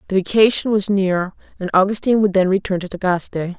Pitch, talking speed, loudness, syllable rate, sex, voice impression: 195 Hz, 185 wpm, -18 LUFS, 6.5 syllables/s, female, feminine, slightly gender-neutral, adult-like, slightly middle-aged, slightly thin, slightly tensed, powerful, slightly dark, hard, clear, fluent, cool, intellectual, slightly refreshing, very sincere, calm, slightly friendly, slightly reassuring, very unique, slightly elegant, wild, lively, very strict, slightly intense, sharp, slightly light